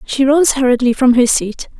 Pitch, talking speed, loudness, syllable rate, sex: 260 Hz, 200 wpm, -13 LUFS, 5.0 syllables/s, female